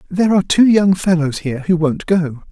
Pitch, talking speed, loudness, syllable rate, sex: 175 Hz, 215 wpm, -15 LUFS, 5.8 syllables/s, male